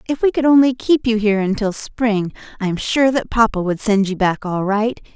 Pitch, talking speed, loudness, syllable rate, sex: 220 Hz, 235 wpm, -17 LUFS, 5.3 syllables/s, female